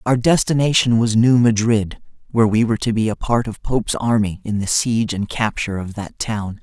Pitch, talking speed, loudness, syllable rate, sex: 110 Hz, 210 wpm, -18 LUFS, 5.5 syllables/s, male